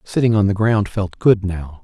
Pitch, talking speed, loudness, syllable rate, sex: 100 Hz, 230 wpm, -17 LUFS, 4.6 syllables/s, male